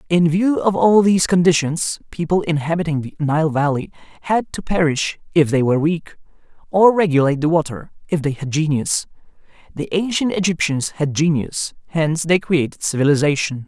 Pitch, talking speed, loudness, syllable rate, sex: 160 Hz, 155 wpm, -18 LUFS, 5.3 syllables/s, male